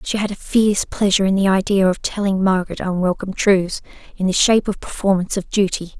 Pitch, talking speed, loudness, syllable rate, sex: 195 Hz, 200 wpm, -18 LUFS, 6.4 syllables/s, female